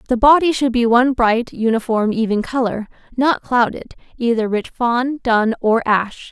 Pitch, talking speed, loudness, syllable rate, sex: 240 Hz, 160 wpm, -17 LUFS, 4.6 syllables/s, female